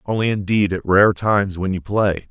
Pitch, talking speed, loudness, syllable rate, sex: 100 Hz, 210 wpm, -18 LUFS, 5.0 syllables/s, male